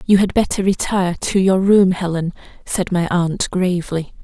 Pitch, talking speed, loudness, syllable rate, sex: 185 Hz, 170 wpm, -17 LUFS, 4.8 syllables/s, female